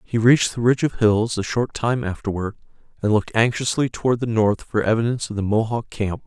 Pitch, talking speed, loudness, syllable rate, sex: 110 Hz, 210 wpm, -21 LUFS, 6.0 syllables/s, male